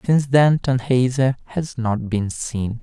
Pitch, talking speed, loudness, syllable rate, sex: 125 Hz, 170 wpm, -20 LUFS, 4.5 syllables/s, male